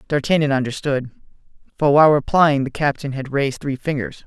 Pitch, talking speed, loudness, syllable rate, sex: 145 Hz, 155 wpm, -19 LUFS, 5.8 syllables/s, male